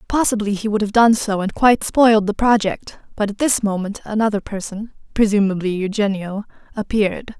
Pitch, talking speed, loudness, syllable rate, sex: 210 Hz, 160 wpm, -18 LUFS, 5.5 syllables/s, female